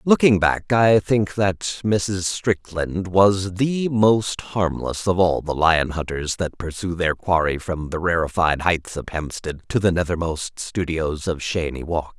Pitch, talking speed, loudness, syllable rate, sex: 90 Hz, 160 wpm, -21 LUFS, 3.9 syllables/s, male